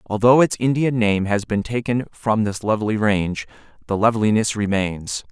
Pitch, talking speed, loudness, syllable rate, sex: 110 Hz, 160 wpm, -20 LUFS, 5.1 syllables/s, male